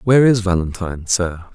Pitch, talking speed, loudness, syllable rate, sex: 95 Hz, 155 wpm, -18 LUFS, 5.6 syllables/s, male